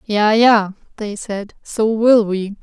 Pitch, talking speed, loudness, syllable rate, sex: 210 Hz, 160 wpm, -15 LUFS, 3.3 syllables/s, female